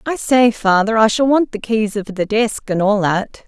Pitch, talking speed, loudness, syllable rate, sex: 220 Hz, 240 wpm, -16 LUFS, 4.5 syllables/s, female